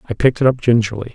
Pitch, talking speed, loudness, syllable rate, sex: 120 Hz, 265 wpm, -16 LUFS, 7.6 syllables/s, male